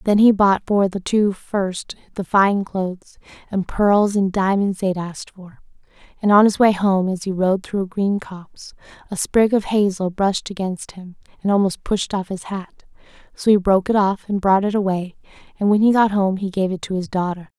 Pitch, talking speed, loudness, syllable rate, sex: 195 Hz, 215 wpm, -19 LUFS, 5.0 syllables/s, female